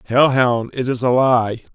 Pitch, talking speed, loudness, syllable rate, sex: 125 Hz, 205 wpm, -17 LUFS, 4.2 syllables/s, male